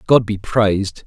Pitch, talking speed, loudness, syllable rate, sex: 105 Hz, 170 wpm, -17 LUFS, 4.3 syllables/s, male